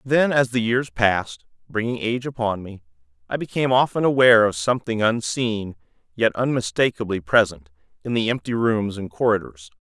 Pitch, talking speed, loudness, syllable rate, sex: 110 Hz, 155 wpm, -21 LUFS, 5.5 syllables/s, male